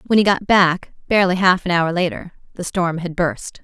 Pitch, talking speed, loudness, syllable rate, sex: 180 Hz, 215 wpm, -18 LUFS, 5.2 syllables/s, female